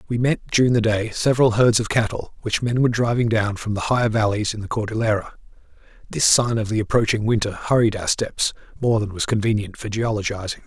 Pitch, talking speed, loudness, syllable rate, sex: 110 Hz, 205 wpm, -21 LUFS, 6.0 syllables/s, male